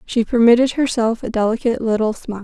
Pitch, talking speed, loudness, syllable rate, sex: 230 Hz, 175 wpm, -17 LUFS, 6.4 syllables/s, female